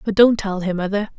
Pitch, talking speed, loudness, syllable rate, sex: 200 Hz, 255 wpm, -19 LUFS, 5.9 syllables/s, female